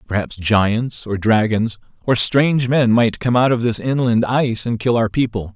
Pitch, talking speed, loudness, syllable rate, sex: 115 Hz, 195 wpm, -17 LUFS, 4.7 syllables/s, male